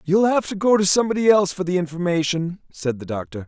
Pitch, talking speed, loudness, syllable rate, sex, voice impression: 175 Hz, 225 wpm, -20 LUFS, 6.5 syllables/s, male, masculine, adult-like, slightly middle-aged, thick, very tensed, powerful, bright, slightly hard, clear, fluent, very cool, intellectual, refreshing, very sincere, very calm, very mature, friendly, very reassuring, unique, slightly elegant, wild, sweet, slightly lively, slightly strict, slightly intense